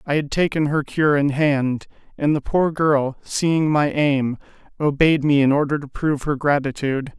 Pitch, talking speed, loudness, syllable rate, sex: 145 Hz, 185 wpm, -20 LUFS, 4.6 syllables/s, male